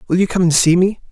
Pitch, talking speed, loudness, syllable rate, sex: 180 Hz, 325 wpm, -14 LUFS, 7.1 syllables/s, male